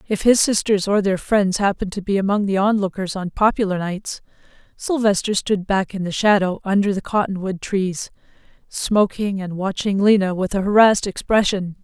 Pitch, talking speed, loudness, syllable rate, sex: 195 Hz, 165 wpm, -19 LUFS, 5.1 syllables/s, female